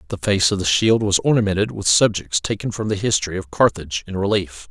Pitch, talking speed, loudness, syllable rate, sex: 100 Hz, 215 wpm, -19 LUFS, 6.1 syllables/s, male